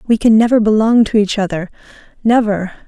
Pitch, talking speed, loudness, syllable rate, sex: 215 Hz, 165 wpm, -13 LUFS, 5.8 syllables/s, female